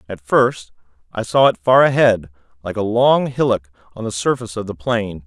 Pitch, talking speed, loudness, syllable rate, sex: 110 Hz, 195 wpm, -17 LUFS, 5.0 syllables/s, male